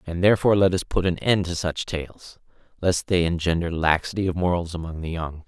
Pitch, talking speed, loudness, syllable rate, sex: 85 Hz, 210 wpm, -23 LUFS, 5.7 syllables/s, male